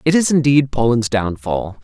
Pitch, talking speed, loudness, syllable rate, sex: 125 Hz, 165 wpm, -16 LUFS, 4.7 syllables/s, male